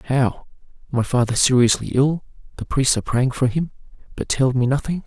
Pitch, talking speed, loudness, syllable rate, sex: 130 Hz, 180 wpm, -20 LUFS, 5.5 syllables/s, male